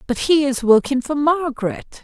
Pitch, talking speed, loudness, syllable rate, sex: 280 Hz, 175 wpm, -18 LUFS, 4.8 syllables/s, female